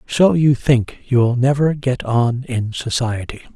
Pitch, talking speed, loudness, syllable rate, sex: 130 Hz, 150 wpm, -17 LUFS, 3.8 syllables/s, male